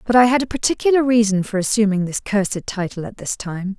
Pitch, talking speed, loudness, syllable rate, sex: 215 Hz, 220 wpm, -19 LUFS, 6.0 syllables/s, female